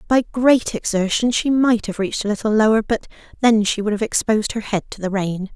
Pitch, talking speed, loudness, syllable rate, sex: 215 Hz, 225 wpm, -19 LUFS, 5.8 syllables/s, female